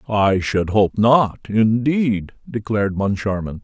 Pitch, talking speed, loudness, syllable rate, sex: 105 Hz, 115 wpm, -18 LUFS, 3.7 syllables/s, male